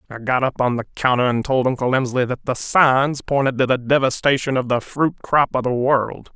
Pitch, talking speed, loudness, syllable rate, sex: 130 Hz, 225 wpm, -19 LUFS, 5.3 syllables/s, male